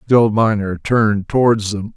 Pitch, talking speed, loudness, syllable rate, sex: 110 Hz, 185 wpm, -16 LUFS, 5.3 syllables/s, male